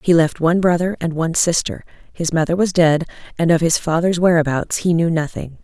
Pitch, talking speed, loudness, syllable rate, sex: 165 Hz, 200 wpm, -17 LUFS, 5.7 syllables/s, female